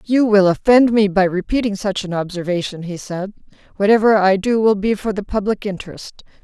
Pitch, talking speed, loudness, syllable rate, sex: 200 Hz, 185 wpm, -17 LUFS, 5.5 syllables/s, female